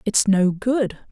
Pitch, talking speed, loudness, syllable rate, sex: 210 Hz, 160 wpm, -20 LUFS, 3.4 syllables/s, female